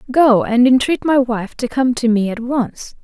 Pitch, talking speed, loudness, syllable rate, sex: 245 Hz, 215 wpm, -16 LUFS, 4.4 syllables/s, female